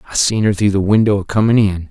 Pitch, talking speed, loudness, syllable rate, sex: 100 Hz, 285 wpm, -14 LUFS, 6.5 syllables/s, male